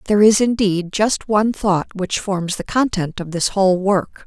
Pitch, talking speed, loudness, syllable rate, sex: 195 Hz, 195 wpm, -18 LUFS, 4.7 syllables/s, female